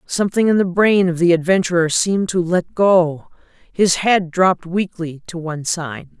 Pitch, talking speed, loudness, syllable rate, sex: 175 Hz, 175 wpm, -17 LUFS, 4.8 syllables/s, female